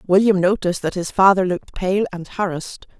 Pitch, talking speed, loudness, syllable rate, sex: 185 Hz, 180 wpm, -19 LUFS, 6.0 syllables/s, female